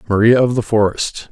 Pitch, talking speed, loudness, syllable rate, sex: 110 Hz, 185 wpm, -15 LUFS, 5.4 syllables/s, male